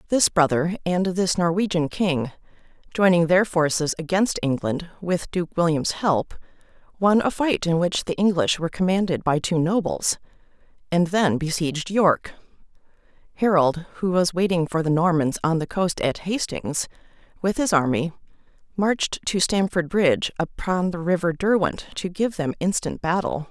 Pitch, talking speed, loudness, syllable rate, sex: 175 Hz, 150 wpm, -22 LUFS, 4.7 syllables/s, female